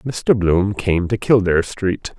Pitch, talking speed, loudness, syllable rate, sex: 100 Hz, 165 wpm, -18 LUFS, 3.7 syllables/s, male